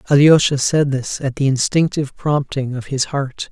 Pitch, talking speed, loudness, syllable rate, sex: 140 Hz, 170 wpm, -17 LUFS, 4.8 syllables/s, male